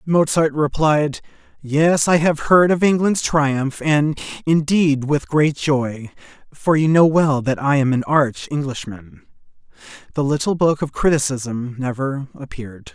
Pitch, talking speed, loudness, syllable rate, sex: 145 Hz, 145 wpm, -18 LUFS, 3.3 syllables/s, male